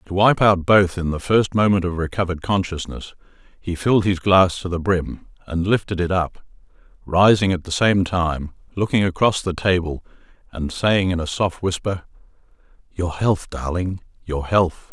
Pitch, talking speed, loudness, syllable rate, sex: 90 Hz, 170 wpm, -20 LUFS, 4.7 syllables/s, male